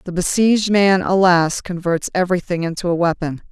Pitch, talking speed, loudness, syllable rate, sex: 180 Hz, 155 wpm, -17 LUFS, 5.5 syllables/s, female